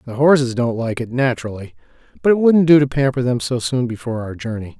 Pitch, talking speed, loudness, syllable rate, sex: 130 Hz, 225 wpm, -17 LUFS, 6.2 syllables/s, male